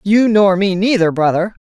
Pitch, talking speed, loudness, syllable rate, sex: 195 Hz, 185 wpm, -13 LUFS, 4.8 syllables/s, female